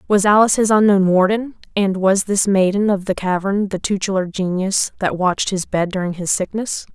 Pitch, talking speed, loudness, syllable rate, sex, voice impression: 195 Hz, 190 wpm, -17 LUFS, 5.3 syllables/s, female, feminine, adult-like, tensed, powerful, soft, raspy, intellectual, calm, friendly, reassuring, elegant, lively, modest